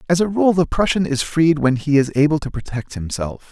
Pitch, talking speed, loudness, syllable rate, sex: 150 Hz, 240 wpm, -18 LUFS, 5.5 syllables/s, male